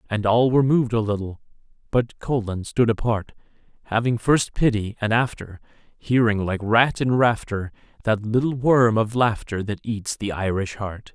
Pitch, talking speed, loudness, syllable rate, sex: 110 Hz, 160 wpm, -22 LUFS, 4.7 syllables/s, male